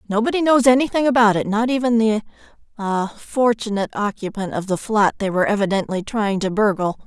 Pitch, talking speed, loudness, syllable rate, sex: 215 Hz, 155 wpm, -19 LUFS, 5.9 syllables/s, female